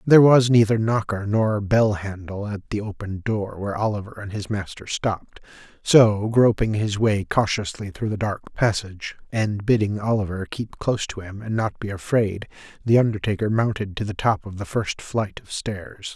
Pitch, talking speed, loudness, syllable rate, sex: 105 Hz, 180 wpm, -22 LUFS, 4.9 syllables/s, male